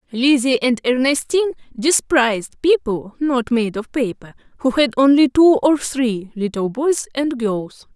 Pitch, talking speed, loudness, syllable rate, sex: 255 Hz, 145 wpm, -18 LUFS, 4.2 syllables/s, female